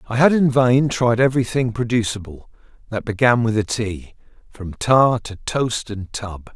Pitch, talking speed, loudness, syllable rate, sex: 115 Hz, 165 wpm, -19 LUFS, 4.5 syllables/s, male